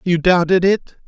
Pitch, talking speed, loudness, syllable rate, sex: 180 Hz, 165 wpm, -15 LUFS, 4.5 syllables/s, male